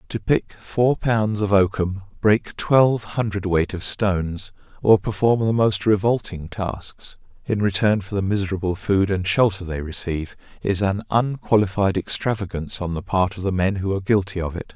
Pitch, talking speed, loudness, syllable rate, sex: 100 Hz, 170 wpm, -21 LUFS, 4.9 syllables/s, male